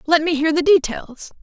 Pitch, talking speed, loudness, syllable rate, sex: 320 Hz, 210 wpm, -17 LUFS, 5.0 syllables/s, female